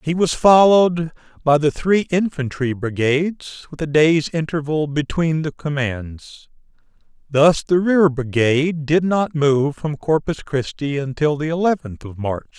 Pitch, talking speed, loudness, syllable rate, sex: 150 Hz, 145 wpm, -18 LUFS, 4.2 syllables/s, male